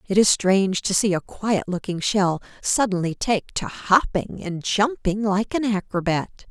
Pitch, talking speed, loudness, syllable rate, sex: 200 Hz, 165 wpm, -22 LUFS, 4.4 syllables/s, female